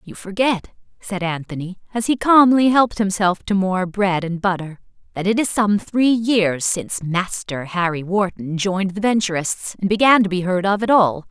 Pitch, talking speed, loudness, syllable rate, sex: 195 Hz, 185 wpm, -19 LUFS, 4.8 syllables/s, female